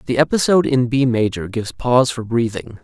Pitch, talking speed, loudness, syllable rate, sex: 125 Hz, 190 wpm, -17 LUFS, 6.0 syllables/s, male